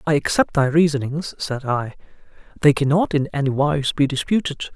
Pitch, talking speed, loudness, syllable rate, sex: 145 Hz, 165 wpm, -20 LUFS, 5.2 syllables/s, male